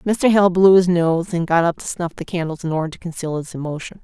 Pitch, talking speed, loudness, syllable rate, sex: 170 Hz, 270 wpm, -18 LUFS, 5.8 syllables/s, female